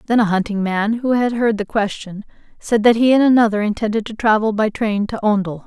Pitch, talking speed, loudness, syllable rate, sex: 215 Hz, 220 wpm, -17 LUFS, 5.7 syllables/s, female